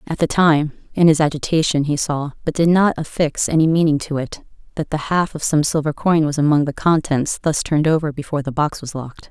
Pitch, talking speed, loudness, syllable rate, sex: 155 Hz, 225 wpm, -18 LUFS, 5.8 syllables/s, female